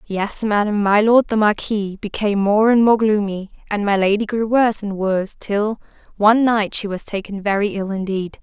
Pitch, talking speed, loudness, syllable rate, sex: 205 Hz, 190 wpm, -18 LUFS, 5.1 syllables/s, female